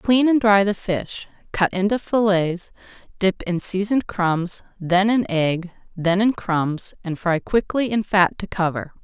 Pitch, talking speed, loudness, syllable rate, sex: 195 Hz, 165 wpm, -21 LUFS, 4.0 syllables/s, female